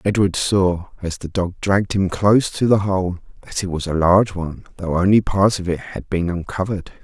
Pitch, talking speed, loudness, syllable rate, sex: 95 Hz, 215 wpm, -19 LUFS, 5.4 syllables/s, male